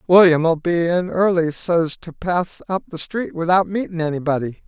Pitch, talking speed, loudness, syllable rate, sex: 170 Hz, 165 wpm, -19 LUFS, 4.6 syllables/s, male